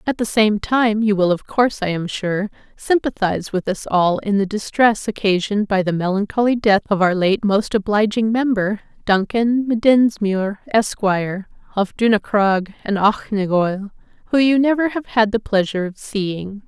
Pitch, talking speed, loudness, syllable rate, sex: 210 Hz, 160 wpm, -18 LUFS, 4.6 syllables/s, female